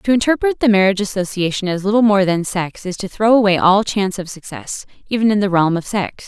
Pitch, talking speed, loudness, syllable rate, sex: 200 Hz, 230 wpm, -16 LUFS, 6.0 syllables/s, female